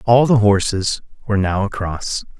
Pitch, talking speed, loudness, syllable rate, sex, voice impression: 105 Hz, 150 wpm, -18 LUFS, 4.7 syllables/s, male, adult-like, thick, soft, clear, fluent, cool, intellectual, sincere, calm, slightly wild, lively, kind